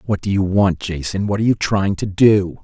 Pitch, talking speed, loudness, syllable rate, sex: 95 Hz, 230 wpm, -17 LUFS, 5.3 syllables/s, male